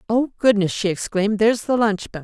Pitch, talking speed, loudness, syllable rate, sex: 210 Hz, 215 wpm, -19 LUFS, 6.0 syllables/s, female